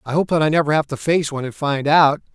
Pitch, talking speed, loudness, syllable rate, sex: 150 Hz, 305 wpm, -18 LUFS, 6.6 syllables/s, male